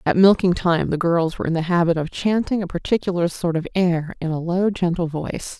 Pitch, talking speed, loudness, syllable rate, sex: 175 Hz, 225 wpm, -20 LUFS, 5.6 syllables/s, female